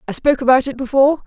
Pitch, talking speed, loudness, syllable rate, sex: 265 Hz, 240 wpm, -15 LUFS, 8.6 syllables/s, female